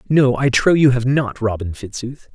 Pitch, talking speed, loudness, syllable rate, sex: 125 Hz, 205 wpm, -17 LUFS, 4.7 syllables/s, male